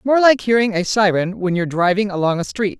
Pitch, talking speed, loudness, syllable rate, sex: 200 Hz, 235 wpm, -17 LUFS, 5.8 syllables/s, female